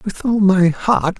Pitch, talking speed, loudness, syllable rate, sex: 195 Hz, 200 wpm, -15 LUFS, 3.7 syllables/s, male